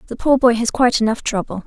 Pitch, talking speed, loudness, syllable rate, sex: 230 Hz, 250 wpm, -17 LUFS, 6.8 syllables/s, female